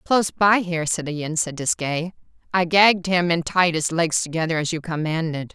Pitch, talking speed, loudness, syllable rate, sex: 170 Hz, 185 wpm, -21 LUFS, 5.2 syllables/s, female